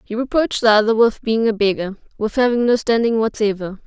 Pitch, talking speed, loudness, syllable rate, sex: 225 Hz, 200 wpm, -17 LUFS, 5.9 syllables/s, female